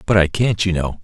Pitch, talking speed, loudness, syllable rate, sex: 90 Hz, 290 wpm, -18 LUFS, 5.6 syllables/s, male